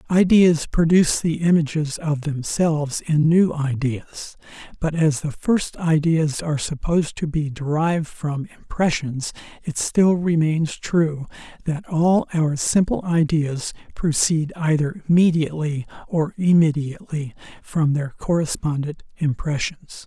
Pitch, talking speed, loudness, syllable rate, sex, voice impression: 155 Hz, 115 wpm, -21 LUFS, 4.1 syllables/s, male, masculine, adult-like, slightly soft, muffled, slightly raspy, calm, kind